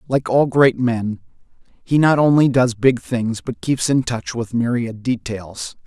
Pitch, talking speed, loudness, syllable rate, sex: 120 Hz, 175 wpm, -18 LUFS, 3.9 syllables/s, male